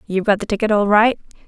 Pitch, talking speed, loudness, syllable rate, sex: 210 Hz, 245 wpm, -17 LUFS, 7.3 syllables/s, female